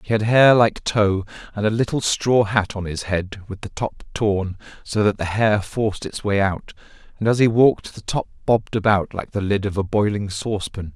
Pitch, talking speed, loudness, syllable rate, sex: 105 Hz, 220 wpm, -20 LUFS, 5.0 syllables/s, male